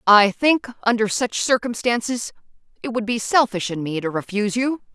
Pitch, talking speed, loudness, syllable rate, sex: 225 Hz, 170 wpm, -20 LUFS, 5.2 syllables/s, female